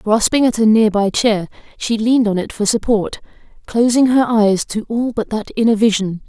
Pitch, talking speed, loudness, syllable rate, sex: 220 Hz, 200 wpm, -16 LUFS, 5.1 syllables/s, female